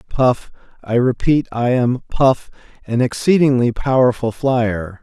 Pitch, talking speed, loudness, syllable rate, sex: 125 Hz, 85 wpm, -17 LUFS, 3.9 syllables/s, male